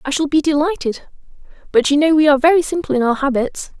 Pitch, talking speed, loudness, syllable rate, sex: 290 Hz, 220 wpm, -16 LUFS, 6.6 syllables/s, female